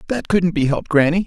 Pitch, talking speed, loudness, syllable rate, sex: 165 Hz, 240 wpm, -17 LUFS, 6.5 syllables/s, male